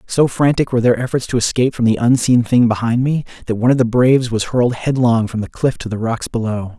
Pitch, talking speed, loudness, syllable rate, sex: 120 Hz, 250 wpm, -16 LUFS, 6.2 syllables/s, male